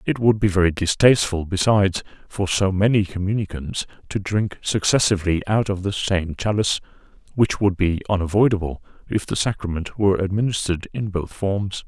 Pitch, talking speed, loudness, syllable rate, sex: 100 Hz, 150 wpm, -21 LUFS, 5.6 syllables/s, male